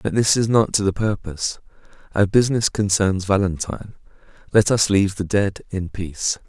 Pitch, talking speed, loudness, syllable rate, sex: 100 Hz, 155 wpm, -20 LUFS, 5.4 syllables/s, male